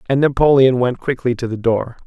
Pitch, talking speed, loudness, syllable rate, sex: 125 Hz, 205 wpm, -16 LUFS, 5.5 syllables/s, male